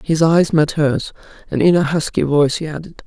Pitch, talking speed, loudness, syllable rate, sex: 160 Hz, 215 wpm, -16 LUFS, 5.4 syllables/s, female